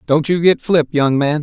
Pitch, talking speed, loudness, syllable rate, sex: 155 Hz, 255 wpm, -15 LUFS, 4.7 syllables/s, male